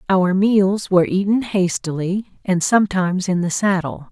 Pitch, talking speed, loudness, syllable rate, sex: 190 Hz, 145 wpm, -18 LUFS, 4.8 syllables/s, female